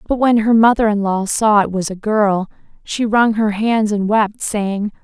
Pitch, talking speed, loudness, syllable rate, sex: 210 Hz, 215 wpm, -16 LUFS, 4.3 syllables/s, female